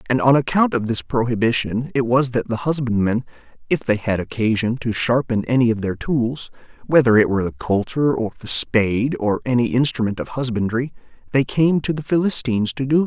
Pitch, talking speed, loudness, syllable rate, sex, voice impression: 125 Hz, 195 wpm, -20 LUFS, 5.5 syllables/s, male, masculine, adult-like, slightly fluent, slightly intellectual, friendly, kind